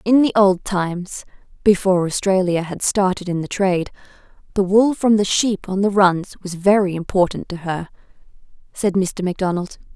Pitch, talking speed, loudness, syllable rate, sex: 190 Hz, 165 wpm, -18 LUFS, 5.2 syllables/s, female